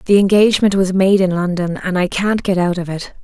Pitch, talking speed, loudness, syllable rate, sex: 185 Hz, 240 wpm, -15 LUFS, 5.7 syllables/s, female